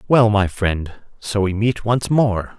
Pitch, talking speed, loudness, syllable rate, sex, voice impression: 105 Hz, 185 wpm, -18 LUFS, 3.5 syllables/s, male, masculine, adult-like, thick, tensed, powerful, slightly soft, slightly muffled, cool, intellectual, calm, friendly, reassuring, wild, slightly lively, kind